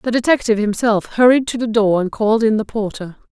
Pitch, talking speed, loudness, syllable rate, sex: 220 Hz, 220 wpm, -16 LUFS, 6.0 syllables/s, female